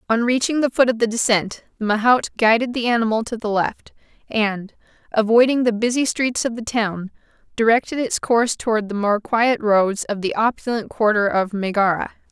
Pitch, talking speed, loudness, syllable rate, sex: 225 Hz, 180 wpm, -19 LUFS, 5.2 syllables/s, female